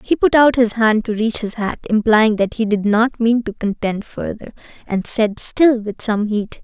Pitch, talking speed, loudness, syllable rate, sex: 220 Hz, 215 wpm, -17 LUFS, 4.4 syllables/s, female